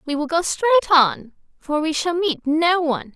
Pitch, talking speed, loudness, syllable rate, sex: 315 Hz, 210 wpm, -19 LUFS, 4.7 syllables/s, female